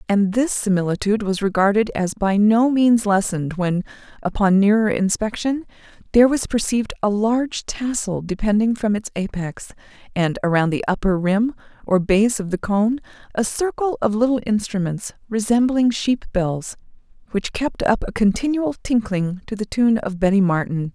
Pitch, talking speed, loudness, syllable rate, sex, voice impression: 210 Hz, 155 wpm, -20 LUFS, 4.9 syllables/s, female, feminine, adult-like, powerful, bright, soft, clear, fluent, intellectual, friendly, elegant, slightly strict, slightly sharp